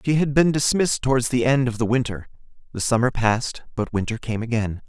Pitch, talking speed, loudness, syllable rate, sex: 120 Hz, 210 wpm, -22 LUFS, 6.0 syllables/s, male